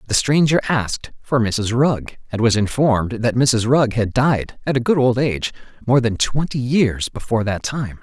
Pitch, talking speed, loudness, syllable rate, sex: 120 Hz, 195 wpm, -18 LUFS, 4.7 syllables/s, male